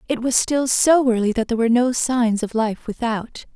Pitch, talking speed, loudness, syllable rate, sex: 240 Hz, 220 wpm, -19 LUFS, 5.2 syllables/s, female